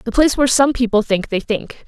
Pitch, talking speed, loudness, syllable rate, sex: 240 Hz, 255 wpm, -16 LUFS, 6.0 syllables/s, female